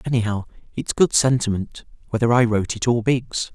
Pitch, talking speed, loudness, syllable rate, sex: 115 Hz, 170 wpm, -21 LUFS, 5.5 syllables/s, male